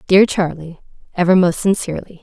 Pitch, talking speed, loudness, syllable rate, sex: 180 Hz, 135 wpm, -16 LUFS, 5.8 syllables/s, female